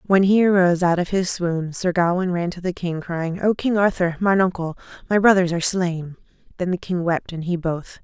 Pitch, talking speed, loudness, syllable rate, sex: 180 Hz, 225 wpm, -20 LUFS, 5.2 syllables/s, female